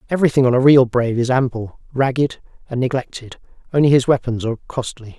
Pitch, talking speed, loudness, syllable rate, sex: 125 Hz, 175 wpm, -17 LUFS, 6.3 syllables/s, male